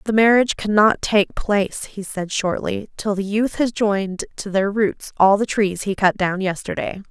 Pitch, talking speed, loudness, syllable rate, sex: 200 Hz, 195 wpm, -20 LUFS, 4.7 syllables/s, female